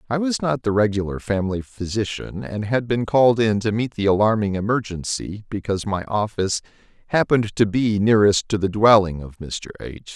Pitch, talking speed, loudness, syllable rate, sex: 105 Hz, 175 wpm, -21 LUFS, 5.5 syllables/s, male